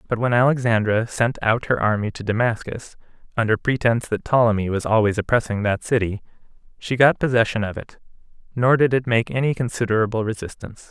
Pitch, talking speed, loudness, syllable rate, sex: 115 Hz, 165 wpm, -20 LUFS, 6.0 syllables/s, male